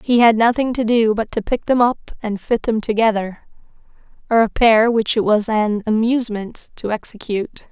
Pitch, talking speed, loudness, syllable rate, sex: 225 Hz, 170 wpm, -18 LUFS, 5.0 syllables/s, female